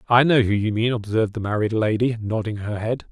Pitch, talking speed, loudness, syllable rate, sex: 110 Hz, 230 wpm, -21 LUFS, 6.0 syllables/s, male